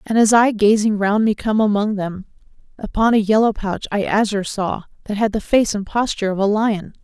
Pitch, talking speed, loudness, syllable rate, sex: 210 Hz, 215 wpm, -18 LUFS, 5.4 syllables/s, female